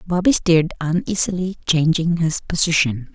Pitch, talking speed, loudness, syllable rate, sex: 165 Hz, 115 wpm, -18 LUFS, 5.0 syllables/s, female